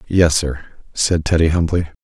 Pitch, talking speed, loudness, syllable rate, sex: 80 Hz, 150 wpm, -17 LUFS, 4.2 syllables/s, male